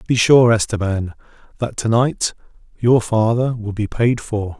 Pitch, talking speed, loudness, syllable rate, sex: 110 Hz, 155 wpm, -17 LUFS, 4.3 syllables/s, male